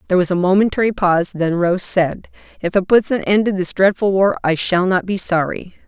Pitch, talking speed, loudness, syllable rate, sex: 190 Hz, 225 wpm, -16 LUFS, 5.6 syllables/s, female